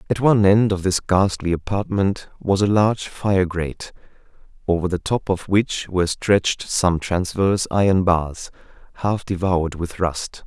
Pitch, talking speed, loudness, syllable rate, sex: 95 Hz, 155 wpm, -20 LUFS, 4.6 syllables/s, male